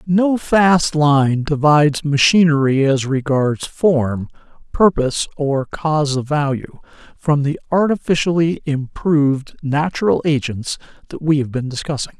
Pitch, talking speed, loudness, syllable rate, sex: 150 Hz, 120 wpm, -17 LUFS, 4.3 syllables/s, male